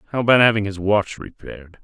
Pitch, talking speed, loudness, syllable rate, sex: 105 Hz, 195 wpm, -17 LUFS, 6.4 syllables/s, male